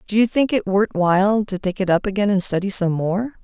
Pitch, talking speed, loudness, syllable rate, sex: 200 Hz, 260 wpm, -19 LUFS, 5.6 syllables/s, female